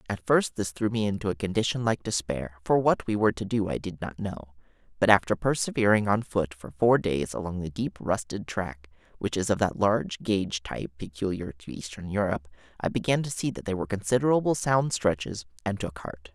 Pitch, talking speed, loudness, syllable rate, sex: 100 Hz, 210 wpm, -27 LUFS, 5.7 syllables/s, male